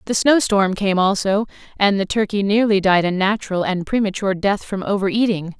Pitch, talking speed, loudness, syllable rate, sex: 200 Hz, 195 wpm, -18 LUFS, 5.5 syllables/s, female